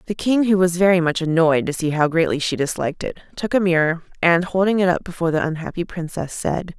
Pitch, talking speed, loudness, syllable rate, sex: 175 Hz, 230 wpm, -19 LUFS, 6.1 syllables/s, female